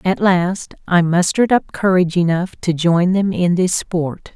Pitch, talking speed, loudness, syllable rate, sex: 180 Hz, 180 wpm, -16 LUFS, 4.4 syllables/s, female